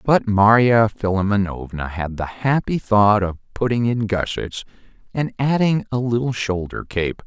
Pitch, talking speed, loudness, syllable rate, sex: 110 Hz, 140 wpm, -19 LUFS, 4.4 syllables/s, male